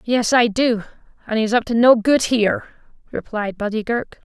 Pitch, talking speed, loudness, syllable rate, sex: 230 Hz, 180 wpm, -18 LUFS, 5.3 syllables/s, female